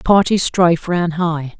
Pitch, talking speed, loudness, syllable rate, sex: 170 Hz, 150 wpm, -16 LUFS, 4.1 syllables/s, female